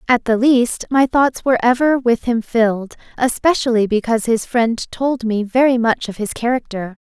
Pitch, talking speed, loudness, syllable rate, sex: 240 Hz, 180 wpm, -17 LUFS, 4.9 syllables/s, female